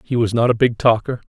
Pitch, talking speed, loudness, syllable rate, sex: 115 Hz, 275 wpm, -17 LUFS, 6.1 syllables/s, male